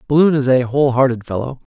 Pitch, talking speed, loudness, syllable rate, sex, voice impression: 130 Hz, 205 wpm, -16 LUFS, 6.8 syllables/s, male, masculine, adult-like, slightly muffled, intellectual, sincere, slightly sweet